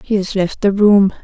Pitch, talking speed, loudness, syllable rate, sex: 200 Hz, 245 wpm, -14 LUFS, 4.6 syllables/s, female